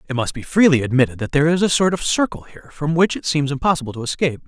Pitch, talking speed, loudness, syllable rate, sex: 150 Hz, 270 wpm, -18 LUFS, 7.4 syllables/s, male